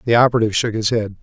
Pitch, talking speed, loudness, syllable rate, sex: 110 Hz, 245 wpm, -17 LUFS, 8.6 syllables/s, male